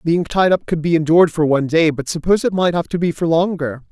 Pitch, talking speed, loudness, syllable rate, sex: 165 Hz, 275 wpm, -16 LUFS, 6.4 syllables/s, male